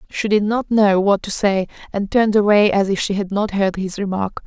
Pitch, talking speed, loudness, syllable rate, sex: 200 Hz, 240 wpm, -18 LUFS, 5.2 syllables/s, female